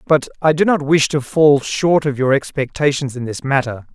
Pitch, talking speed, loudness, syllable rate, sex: 140 Hz, 215 wpm, -16 LUFS, 5.0 syllables/s, male